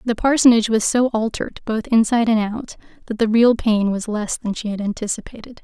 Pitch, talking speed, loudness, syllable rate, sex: 225 Hz, 200 wpm, -19 LUFS, 5.8 syllables/s, female